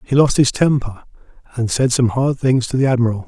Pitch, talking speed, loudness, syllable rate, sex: 125 Hz, 220 wpm, -16 LUFS, 5.8 syllables/s, male